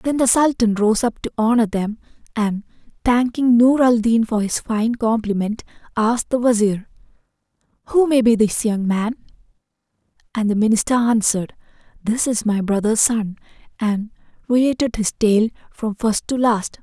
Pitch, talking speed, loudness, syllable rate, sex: 225 Hz, 155 wpm, -18 LUFS, 4.8 syllables/s, female